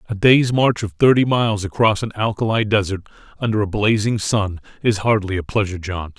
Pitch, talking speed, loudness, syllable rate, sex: 105 Hz, 185 wpm, -18 LUFS, 5.6 syllables/s, male